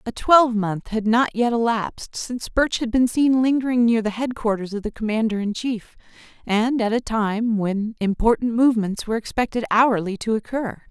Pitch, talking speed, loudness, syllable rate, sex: 225 Hz, 175 wpm, -21 LUFS, 5.1 syllables/s, female